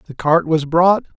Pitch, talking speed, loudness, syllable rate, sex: 165 Hz, 205 wpm, -15 LUFS, 4.4 syllables/s, male